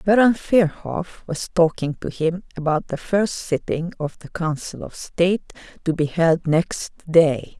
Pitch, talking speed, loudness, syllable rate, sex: 170 Hz, 160 wpm, -21 LUFS, 4.1 syllables/s, female